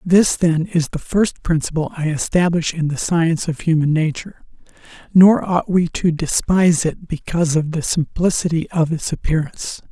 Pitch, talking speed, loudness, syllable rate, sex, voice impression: 165 Hz, 165 wpm, -18 LUFS, 5.0 syllables/s, male, very masculine, old, slightly thick, relaxed, slightly weak, slightly dark, slightly soft, muffled, slightly halting, very raspy, slightly cool, intellectual, sincere, very calm, very mature, friendly, reassuring, very unique, slightly elegant, wild, sweet, slightly lively, kind, modest